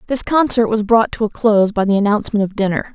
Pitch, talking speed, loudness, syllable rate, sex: 215 Hz, 245 wpm, -16 LUFS, 6.5 syllables/s, female